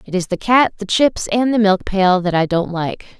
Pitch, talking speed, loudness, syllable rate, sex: 200 Hz, 265 wpm, -16 LUFS, 4.8 syllables/s, female